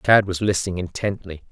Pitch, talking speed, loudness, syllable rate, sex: 95 Hz, 160 wpm, -22 LUFS, 5.6 syllables/s, male